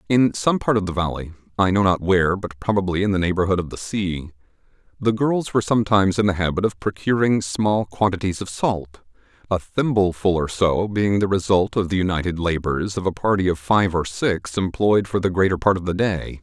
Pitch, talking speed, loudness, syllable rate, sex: 95 Hz, 205 wpm, -21 LUFS, 5.5 syllables/s, male